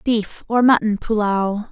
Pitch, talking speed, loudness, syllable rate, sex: 220 Hz, 140 wpm, -18 LUFS, 3.9 syllables/s, female